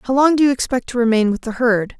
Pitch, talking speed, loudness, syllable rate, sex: 245 Hz, 300 wpm, -17 LUFS, 6.2 syllables/s, female